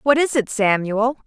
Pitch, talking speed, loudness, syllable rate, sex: 235 Hz, 190 wpm, -19 LUFS, 4.6 syllables/s, female